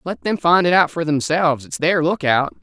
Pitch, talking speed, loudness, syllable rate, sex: 160 Hz, 230 wpm, -17 LUFS, 5.2 syllables/s, male